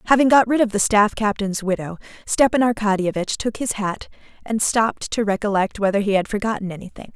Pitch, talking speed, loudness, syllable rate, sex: 210 Hz, 185 wpm, -20 LUFS, 5.9 syllables/s, female